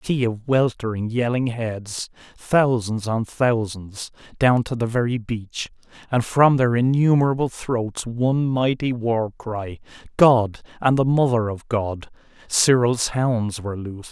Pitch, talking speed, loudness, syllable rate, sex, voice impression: 120 Hz, 135 wpm, -21 LUFS, 4.1 syllables/s, male, very masculine, slightly old, thick, muffled, cool, sincere, calm, slightly wild, slightly kind